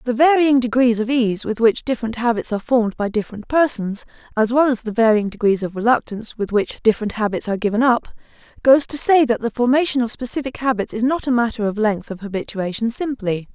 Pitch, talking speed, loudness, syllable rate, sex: 235 Hz, 210 wpm, -19 LUFS, 6.2 syllables/s, female